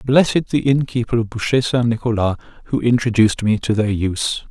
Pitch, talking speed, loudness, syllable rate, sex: 115 Hz, 175 wpm, -18 LUFS, 5.7 syllables/s, male